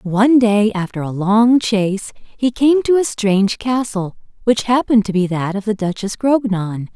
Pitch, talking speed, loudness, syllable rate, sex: 215 Hz, 180 wpm, -16 LUFS, 4.7 syllables/s, female